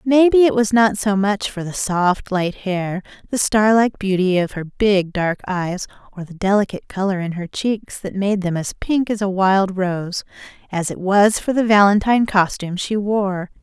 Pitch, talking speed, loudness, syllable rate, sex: 200 Hz, 200 wpm, -18 LUFS, 4.6 syllables/s, female